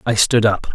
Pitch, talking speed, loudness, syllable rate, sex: 110 Hz, 245 wpm, -16 LUFS, 4.8 syllables/s, male